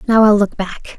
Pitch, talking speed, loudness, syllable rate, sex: 210 Hz, 245 wpm, -13 LUFS, 4.8 syllables/s, female